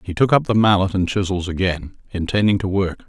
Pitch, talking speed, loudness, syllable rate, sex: 95 Hz, 215 wpm, -19 LUFS, 5.7 syllables/s, male